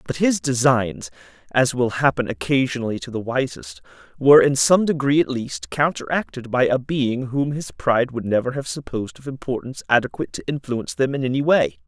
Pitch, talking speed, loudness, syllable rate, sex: 130 Hz, 180 wpm, -21 LUFS, 5.6 syllables/s, male